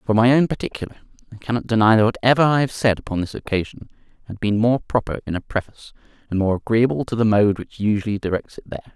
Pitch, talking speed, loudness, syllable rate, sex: 110 Hz, 220 wpm, -20 LUFS, 6.9 syllables/s, male